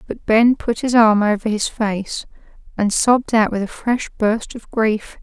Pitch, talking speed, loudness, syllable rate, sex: 220 Hz, 195 wpm, -18 LUFS, 4.2 syllables/s, female